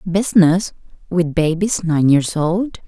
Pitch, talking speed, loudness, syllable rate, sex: 175 Hz, 105 wpm, -16 LUFS, 3.9 syllables/s, female